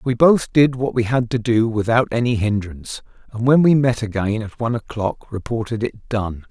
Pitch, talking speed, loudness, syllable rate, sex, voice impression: 115 Hz, 205 wpm, -19 LUFS, 5.1 syllables/s, male, very masculine, very adult-like, thick, cool, sincere, slightly calm, slightly wild